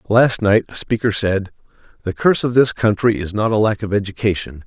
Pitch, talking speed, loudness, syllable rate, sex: 105 Hz, 205 wpm, -17 LUFS, 5.5 syllables/s, male